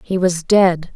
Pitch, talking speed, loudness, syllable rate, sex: 180 Hz, 190 wpm, -16 LUFS, 3.5 syllables/s, female